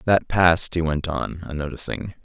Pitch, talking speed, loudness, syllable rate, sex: 85 Hz, 160 wpm, -22 LUFS, 5.0 syllables/s, male